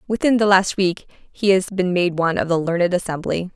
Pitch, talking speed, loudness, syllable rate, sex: 185 Hz, 220 wpm, -19 LUFS, 5.6 syllables/s, female